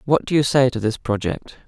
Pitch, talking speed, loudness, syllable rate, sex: 125 Hz, 250 wpm, -20 LUFS, 5.4 syllables/s, male